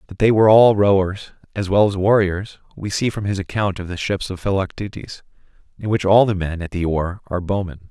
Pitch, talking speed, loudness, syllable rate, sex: 95 Hz, 220 wpm, -19 LUFS, 5.6 syllables/s, male